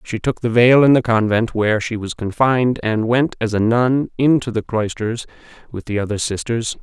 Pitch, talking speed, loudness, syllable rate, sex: 115 Hz, 200 wpm, -17 LUFS, 5.0 syllables/s, male